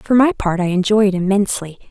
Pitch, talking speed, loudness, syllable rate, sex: 200 Hz, 220 wpm, -16 LUFS, 6.2 syllables/s, female